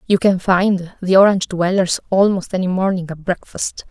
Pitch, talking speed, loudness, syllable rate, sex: 185 Hz, 170 wpm, -17 LUFS, 5.0 syllables/s, female